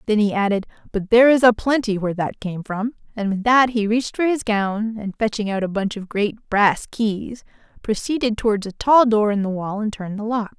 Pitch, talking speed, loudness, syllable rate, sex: 215 Hz, 230 wpm, -20 LUFS, 5.4 syllables/s, female